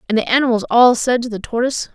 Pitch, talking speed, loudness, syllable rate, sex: 235 Hz, 245 wpm, -16 LUFS, 7.1 syllables/s, female